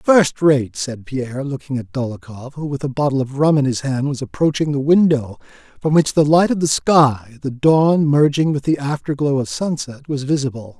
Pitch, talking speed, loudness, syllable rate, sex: 140 Hz, 205 wpm, -18 LUFS, 5.1 syllables/s, male